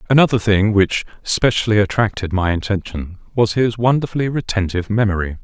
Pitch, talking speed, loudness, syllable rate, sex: 105 Hz, 130 wpm, -17 LUFS, 5.8 syllables/s, male